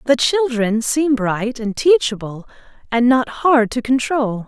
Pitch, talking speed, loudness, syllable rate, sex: 245 Hz, 150 wpm, -17 LUFS, 3.9 syllables/s, female